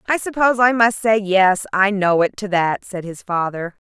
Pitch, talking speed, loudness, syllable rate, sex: 200 Hz, 215 wpm, -17 LUFS, 4.8 syllables/s, female